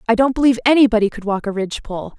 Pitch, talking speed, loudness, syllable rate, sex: 230 Hz, 220 wpm, -17 LUFS, 8.2 syllables/s, female